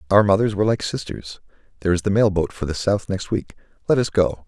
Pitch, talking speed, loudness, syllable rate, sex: 100 Hz, 230 wpm, -21 LUFS, 6.3 syllables/s, male